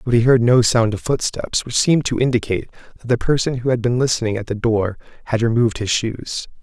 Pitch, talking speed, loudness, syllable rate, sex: 115 Hz, 225 wpm, -18 LUFS, 6.1 syllables/s, male